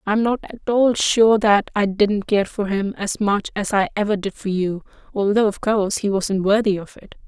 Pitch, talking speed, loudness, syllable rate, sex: 205 Hz, 230 wpm, -19 LUFS, 5.0 syllables/s, female